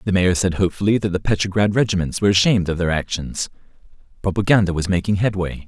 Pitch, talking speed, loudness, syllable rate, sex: 95 Hz, 180 wpm, -19 LUFS, 6.9 syllables/s, male